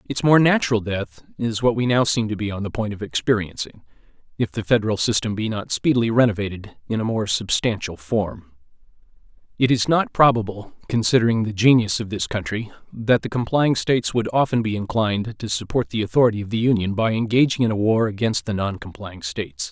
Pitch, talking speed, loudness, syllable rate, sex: 110 Hz, 195 wpm, -21 LUFS, 5.8 syllables/s, male